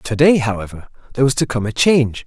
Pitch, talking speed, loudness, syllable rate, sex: 125 Hz, 240 wpm, -16 LUFS, 6.7 syllables/s, male